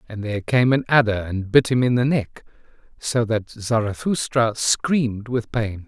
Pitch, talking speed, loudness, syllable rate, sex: 115 Hz, 175 wpm, -21 LUFS, 4.5 syllables/s, male